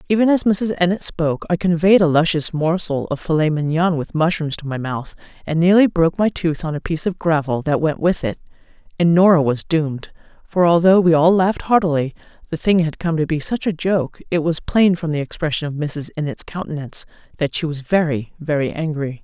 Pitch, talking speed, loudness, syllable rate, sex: 165 Hz, 210 wpm, -18 LUFS, 5.6 syllables/s, female